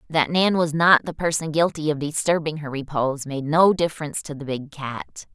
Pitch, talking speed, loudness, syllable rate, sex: 155 Hz, 200 wpm, -22 LUFS, 5.3 syllables/s, female